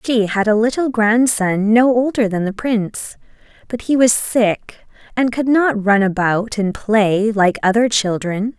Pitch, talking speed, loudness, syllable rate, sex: 220 Hz, 170 wpm, -16 LUFS, 4.1 syllables/s, female